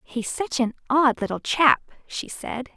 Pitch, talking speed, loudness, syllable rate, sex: 260 Hz, 175 wpm, -23 LUFS, 4.0 syllables/s, female